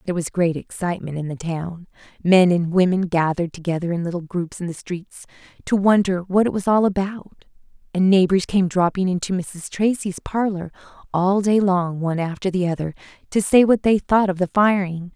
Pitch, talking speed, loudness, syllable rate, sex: 180 Hz, 190 wpm, -20 LUFS, 5.3 syllables/s, female